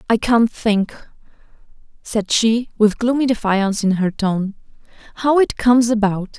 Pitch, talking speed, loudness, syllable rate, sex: 220 Hz, 140 wpm, -17 LUFS, 4.4 syllables/s, female